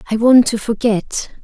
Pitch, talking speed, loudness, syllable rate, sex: 225 Hz, 165 wpm, -15 LUFS, 4.5 syllables/s, female